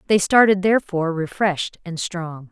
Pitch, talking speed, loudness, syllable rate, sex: 185 Hz, 145 wpm, -20 LUFS, 5.3 syllables/s, female